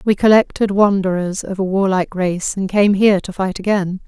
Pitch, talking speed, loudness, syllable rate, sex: 195 Hz, 190 wpm, -16 LUFS, 5.3 syllables/s, female